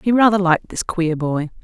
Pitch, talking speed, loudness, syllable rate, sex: 180 Hz, 220 wpm, -18 LUFS, 5.6 syllables/s, female